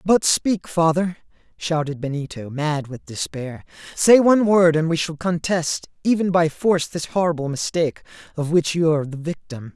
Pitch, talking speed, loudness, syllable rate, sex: 160 Hz, 165 wpm, -20 LUFS, 5.0 syllables/s, male